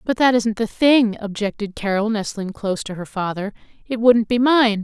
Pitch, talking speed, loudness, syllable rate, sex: 220 Hz, 200 wpm, -19 LUFS, 5.0 syllables/s, female